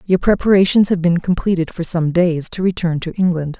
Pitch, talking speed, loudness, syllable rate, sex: 175 Hz, 200 wpm, -16 LUFS, 5.4 syllables/s, female